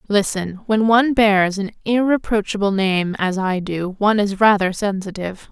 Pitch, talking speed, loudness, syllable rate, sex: 205 Hz, 140 wpm, -18 LUFS, 4.9 syllables/s, female